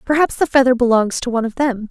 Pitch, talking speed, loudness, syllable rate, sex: 250 Hz, 250 wpm, -16 LUFS, 6.7 syllables/s, female